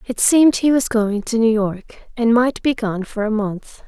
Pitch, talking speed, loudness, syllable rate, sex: 225 Hz, 230 wpm, -17 LUFS, 4.4 syllables/s, female